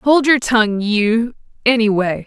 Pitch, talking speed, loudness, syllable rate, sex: 230 Hz, 130 wpm, -15 LUFS, 4.2 syllables/s, female